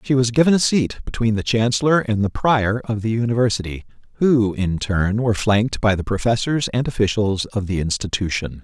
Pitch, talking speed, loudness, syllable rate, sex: 110 Hz, 190 wpm, -19 LUFS, 5.4 syllables/s, male